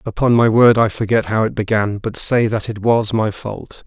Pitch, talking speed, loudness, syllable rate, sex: 110 Hz, 235 wpm, -16 LUFS, 4.8 syllables/s, male